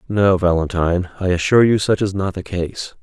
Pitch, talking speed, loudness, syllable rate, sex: 95 Hz, 200 wpm, -18 LUFS, 5.5 syllables/s, male